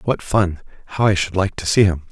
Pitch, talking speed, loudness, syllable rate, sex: 95 Hz, 255 wpm, -18 LUFS, 5.7 syllables/s, male